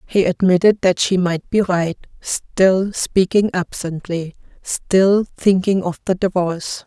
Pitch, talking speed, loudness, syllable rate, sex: 185 Hz, 130 wpm, -18 LUFS, 3.8 syllables/s, female